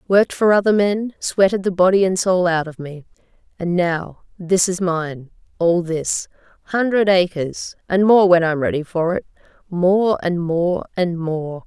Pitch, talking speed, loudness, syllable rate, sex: 180 Hz, 170 wpm, -18 LUFS, 4.3 syllables/s, female